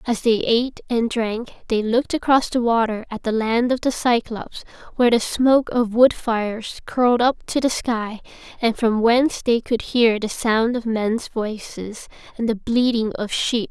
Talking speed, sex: 195 wpm, female